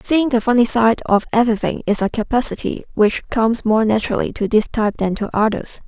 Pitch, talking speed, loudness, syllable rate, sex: 225 Hz, 195 wpm, -17 LUFS, 5.9 syllables/s, female